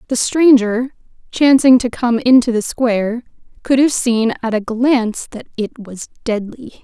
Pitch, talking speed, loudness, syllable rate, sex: 240 Hz, 160 wpm, -15 LUFS, 4.4 syllables/s, female